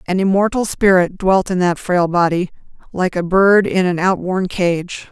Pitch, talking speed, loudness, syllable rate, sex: 185 Hz, 175 wpm, -16 LUFS, 4.4 syllables/s, female